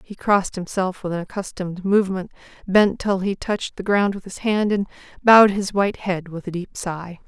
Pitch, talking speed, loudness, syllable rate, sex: 190 Hz, 205 wpm, -21 LUFS, 5.4 syllables/s, female